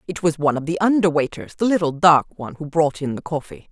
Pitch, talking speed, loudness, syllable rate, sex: 160 Hz, 225 wpm, -20 LUFS, 6.3 syllables/s, female